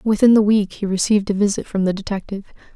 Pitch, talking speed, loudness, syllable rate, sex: 200 Hz, 220 wpm, -18 LUFS, 6.9 syllables/s, female